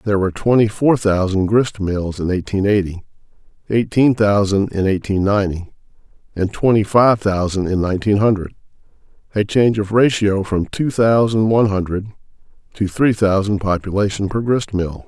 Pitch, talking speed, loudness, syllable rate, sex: 100 Hz, 150 wpm, -17 LUFS, 5.2 syllables/s, male